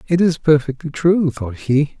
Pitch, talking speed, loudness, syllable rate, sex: 150 Hz, 180 wpm, -17 LUFS, 4.4 syllables/s, male